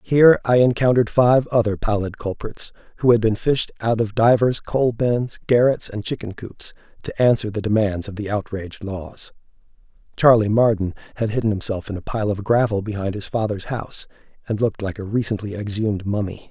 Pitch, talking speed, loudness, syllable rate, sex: 110 Hz, 180 wpm, -20 LUFS, 3.1 syllables/s, male